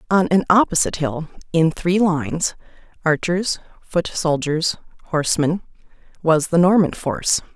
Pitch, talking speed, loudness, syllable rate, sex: 170 Hz, 120 wpm, -19 LUFS, 4.7 syllables/s, female